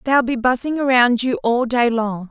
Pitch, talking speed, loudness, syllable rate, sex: 245 Hz, 210 wpm, -17 LUFS, 4.7 syllables/s, female